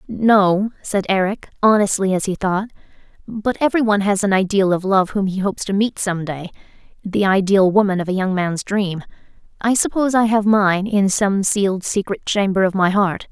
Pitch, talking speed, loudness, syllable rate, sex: 200 Hz, 185 wpm, -18 LUFS, 5.3 syllables/s, female